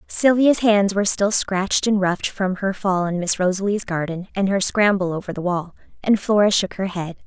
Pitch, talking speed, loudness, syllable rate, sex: 195 Hz, 205 wpm, -20 LUFS, 5.2 syllables/s, female